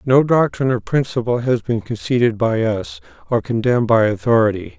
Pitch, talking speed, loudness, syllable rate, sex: 120 Hz, 165 wpm, -18 LUFS, 5.4 syllables/s, male